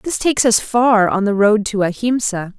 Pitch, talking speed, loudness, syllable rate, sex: 215 Hz, 210 wpm, -15 LUFS, 4.7 syllables/s, female